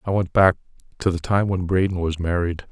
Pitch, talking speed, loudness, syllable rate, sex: 90 Hz, 200 wpm, -21 LUFS, 5.5 syllables/s, male